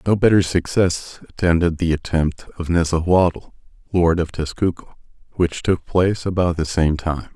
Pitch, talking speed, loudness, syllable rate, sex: 85 Hz, 145 wpm, -19 LUFS, 4.6 syllables/s, male